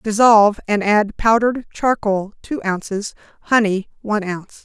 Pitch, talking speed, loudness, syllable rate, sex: 210 Hz, 130 wpm, -18 LUFS, 4.9 syllables/s, female